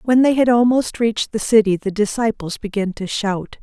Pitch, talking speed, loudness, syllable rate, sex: 220 Hz, 200 wpm, -18 LUFS, 5.1 syllables/s, female